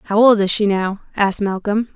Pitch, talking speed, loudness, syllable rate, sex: 205 Hz, 215 wpm, -17 LUFS, 5.1 syllables/s, female